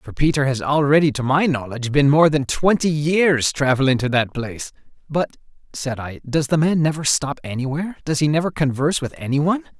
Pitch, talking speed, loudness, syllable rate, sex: 145 Hz, 190 wpm, -19 LUFS, 5.6 syllables/s, male